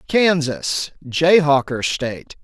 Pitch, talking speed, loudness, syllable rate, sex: 155 Hz, 75 wpm, -18 LUFS, 3.3 syllables/s, male